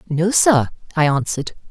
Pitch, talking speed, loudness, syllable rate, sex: 165 Hz, 140 wpm, -17 LUFS, 5.1 syllables/s, female